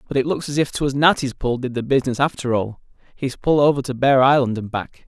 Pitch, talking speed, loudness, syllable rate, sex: 130 Hz, 235 wpm, -19 LUFS, 5.9 syllables/s, male